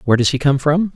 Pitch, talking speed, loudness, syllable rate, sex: 145 Hz, 315 wpm, -16 LUFS, 7.2 syllables/s, male